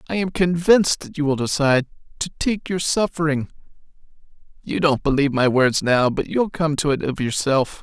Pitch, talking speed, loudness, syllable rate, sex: 155 Hz, 185 wpm, -20 LUFS, 5.3 syllables/s, male